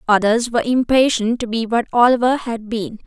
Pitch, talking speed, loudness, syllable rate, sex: 235 Hz, 175 wpm, -17 LUFS, 5.4 syllables/s, female